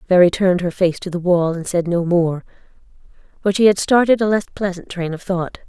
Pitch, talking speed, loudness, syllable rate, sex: 180 Hz, 220 wpm, -18 LUFS, 5.7 syllables/s, female